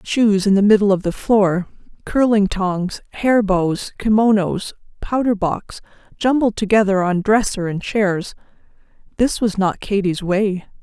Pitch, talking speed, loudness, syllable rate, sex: 200 Hz, 135 wpm, -18 LUFS, 4.1 syllables/s, female